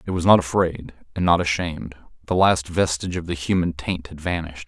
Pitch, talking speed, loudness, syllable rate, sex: 85 Hz, 205 wpm, -21 LUFS, 6.0 syllables/s, male